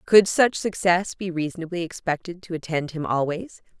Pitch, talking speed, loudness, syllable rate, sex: 175 Hz, 160 wpm, -24 LUFS, 5.1 syllables/s, female